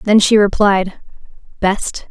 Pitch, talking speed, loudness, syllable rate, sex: 200 Hz, 115 wpm, -14 LUFS, 3.7 syllables/s, female